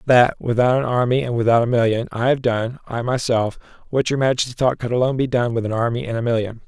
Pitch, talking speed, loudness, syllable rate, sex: 120 Hz, 225 wpm, -19 LUFS, 6.3 syllables/s, male